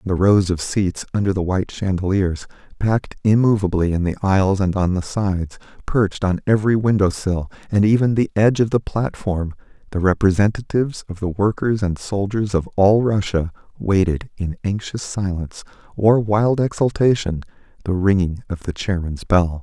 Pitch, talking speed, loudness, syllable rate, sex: 100 Hz, 160 wpm, -19 LUFS, 5.2 syllables/s, male